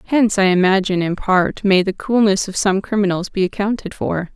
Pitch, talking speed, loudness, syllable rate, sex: 195 Hz, 195 wpm, -17 LUFS, 5.5 syllables/s, female